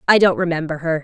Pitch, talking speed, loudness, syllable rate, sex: 165 Hz, 230 wpm, -18 LUFS, 6.9 syllables/s, female